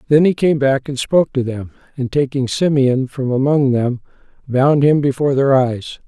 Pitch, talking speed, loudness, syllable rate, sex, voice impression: 135 Hz, 190 wpm, -16 LUFS, 4.9 syllables/s, male, very masculine, old, very relaxed, very weak, very dark, very soft, very muffled, slightly halting, raspy, slightly cool, intellectual, very sincere, very calm, very mature, slightly friendly, slightly reassuring, very unique, very elegant, slightly wild, slightly sweet, lively, very kind, very modest